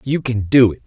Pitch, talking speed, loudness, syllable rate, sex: 120 Hz, 275 wpm, -16 LUFS, 5.3 syllables/s, male